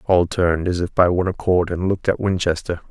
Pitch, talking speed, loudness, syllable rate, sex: 90 Hz, 225 wpm, -19 LUFS, 6.3 syllables/s, male